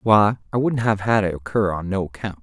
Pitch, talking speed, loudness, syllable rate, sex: 100 Hz, 245 wpm, -21 LUFS, 5.4 syllables/s, male